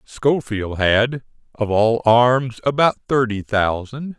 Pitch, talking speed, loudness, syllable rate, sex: 120 Hz, 115 wpm, -18 LUFS, 3.3 syllables/s, male